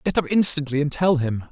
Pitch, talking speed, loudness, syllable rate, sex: 150 Hz, 240 wpm, -20 LUFS, 5.7 syllables/s, male